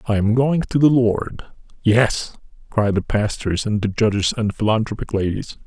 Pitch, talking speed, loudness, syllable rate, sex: 110 Hz, 170 wpm, -19 LUFS, 4.7 syllables/s, male